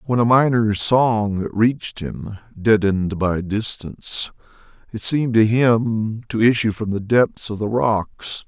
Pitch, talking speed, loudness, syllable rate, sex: 110 Hz, 150 wpm, -19 LUFS, 3.9 syllables/s, male